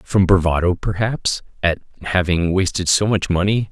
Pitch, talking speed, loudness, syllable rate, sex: 95 Hz, 145 wpm, -18 LUFS, 4.7 syllables/s, male